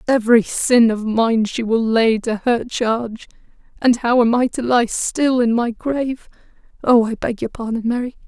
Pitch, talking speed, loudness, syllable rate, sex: 235 Hz, 180 wpm, -18 LUFS, 4.6 syllables/s, female